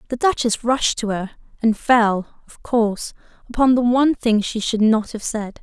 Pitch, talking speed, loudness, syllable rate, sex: 230 Hz, 190 wpm, -19 LUFS, 4.7 syllables/s, female